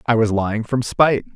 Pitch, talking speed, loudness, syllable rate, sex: 115 Hz, 220 wpm, -18 LUFS, 6.1 syllables/s, male